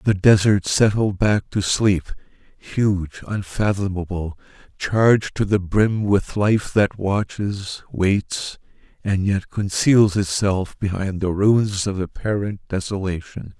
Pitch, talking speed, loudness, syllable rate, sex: 100 Hz, 120 wpm, -20 LUFS, 3.7 syllables/s, male